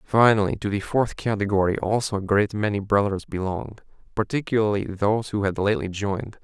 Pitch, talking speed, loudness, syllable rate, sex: 105 Hz, 160 wpm, -23 LUFS, 5.8 syllables/s, male